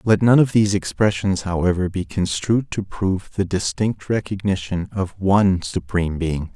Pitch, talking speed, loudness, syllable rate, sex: 95 Hz, 155 wpm, -20 LUFS, 4.9 syllables/s, male